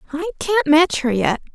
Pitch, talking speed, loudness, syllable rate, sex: 290 Hz, 195 wpm, -18 LUFS, 4.6 syllables/s, female